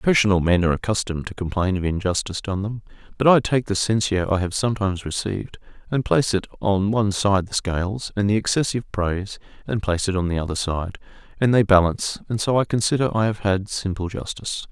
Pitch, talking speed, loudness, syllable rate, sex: 100 Hz, 205 wpm, -22 LUFS, 6.5 syllables/s, male